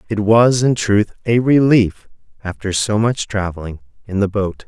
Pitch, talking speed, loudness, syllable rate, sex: 105 Hz, 165 wpm, -16 LUFS, 4.5 syllables/s, male